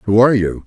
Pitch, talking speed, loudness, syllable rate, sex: 110 Hz, 270 wpm, -14 LUFS, 6.4 syllables/s, male